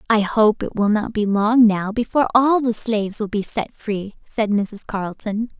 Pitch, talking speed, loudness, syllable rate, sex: 215 Hz, 205 wpm, -20 LUFS, 4.8 syllables/s, female